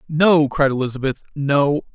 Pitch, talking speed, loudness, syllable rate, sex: 145 Hz, 95 wpm, -18 LUFS, 4.4 syllables/s, male